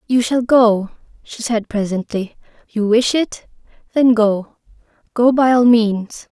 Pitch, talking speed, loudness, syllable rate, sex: 230 Hz, 115 wpm, -16 LUFS, 3.8 syllables/s, female